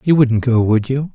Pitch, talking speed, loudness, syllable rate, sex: 125 Hz, 260 wpm, -15 LUFS, 4.8 syllables/s, male